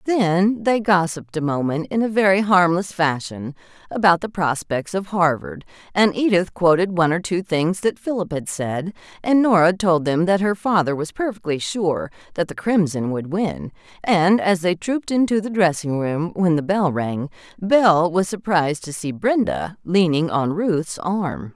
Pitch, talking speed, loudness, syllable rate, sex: 175 Hz, 175 wpm, -20 LUFS, 4.6 syllables/s, female